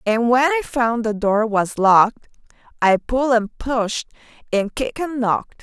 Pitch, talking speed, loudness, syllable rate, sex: 235 Hz, 170 wpm, -19 LUFS, 4.5 syllables/s, female